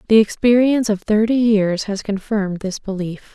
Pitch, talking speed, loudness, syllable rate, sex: 210 Hz, 160 wpm, -18 LUFS, 5.1 syllables/s, female